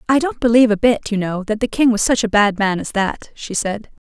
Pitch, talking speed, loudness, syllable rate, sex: 220 Hz, 280 wpm, -17 LUFS, 5.7 syllables/s, female